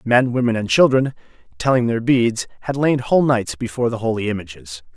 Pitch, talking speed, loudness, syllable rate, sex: 115 Hz, 180 wpm, -18 LUFS, 5.8 syllables/s, male